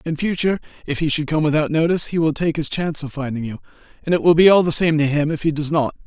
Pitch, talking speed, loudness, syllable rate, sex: 155 Hz, 285 wpm, -19 LUFS, 7.0 syllables/s, male